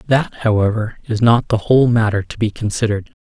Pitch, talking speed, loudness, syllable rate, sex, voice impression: 110 Hz, 185 wpm, -17 LUFS, 5.9 syllables/s, male, masculine, adult-like, slightly dark, refreshing, slightly sincere, reassuring, slightly kind